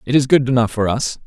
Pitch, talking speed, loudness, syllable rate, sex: 125 Hz, 285 wpm, -16 LUFS, 6.4 syllables/s, male